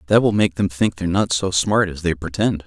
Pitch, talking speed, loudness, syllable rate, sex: 90 Hz, 270 wpm, -19 LUFS, 5.7 syllables/s, male